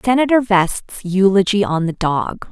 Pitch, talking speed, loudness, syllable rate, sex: 200 Hz, 145 wpm, -16 LUFS, 4.5 syllables/s, female